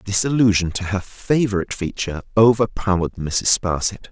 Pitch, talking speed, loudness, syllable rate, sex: 100 Hz, 130 wpm, -19 LUFS, 5.4 syllables/s, male